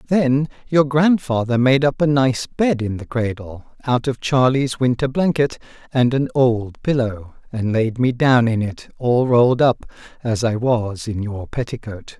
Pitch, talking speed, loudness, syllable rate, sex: 125 Hz, 170 wpm, -19 LUFS, 4.2 syllables/s, male